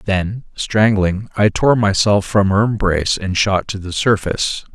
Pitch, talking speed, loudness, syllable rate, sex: 100 Hz, 165 wpm, -16 LUFS, 4.4 syllables/s, male